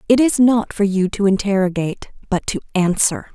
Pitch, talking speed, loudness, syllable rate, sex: 205 Hz, 180 wpm, -18 LUFS, 5.3 syllables/s, female